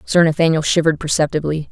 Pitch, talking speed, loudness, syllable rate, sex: 160 Hz, 140 wpm, -16 LUFS, 6.8 syllables/s, female